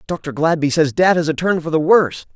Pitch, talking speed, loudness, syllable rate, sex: 160 Hz, 255 wpm, -16 LUFS, 5.6 syllables/s, male